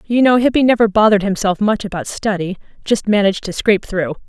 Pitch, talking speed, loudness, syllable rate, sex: 205 Hz, 195 wpm, -16 LUFS, 6.3 syllables/s, female